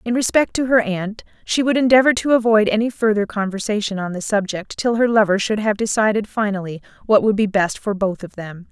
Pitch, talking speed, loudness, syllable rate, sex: 215 Hz, 215 wpm, -18 LUFS, 5.6 syllables/s, female